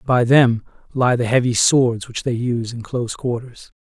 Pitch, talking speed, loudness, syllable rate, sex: 120 Hz, 190 wpm, -18 LUFS, 4.7 syllables/s, male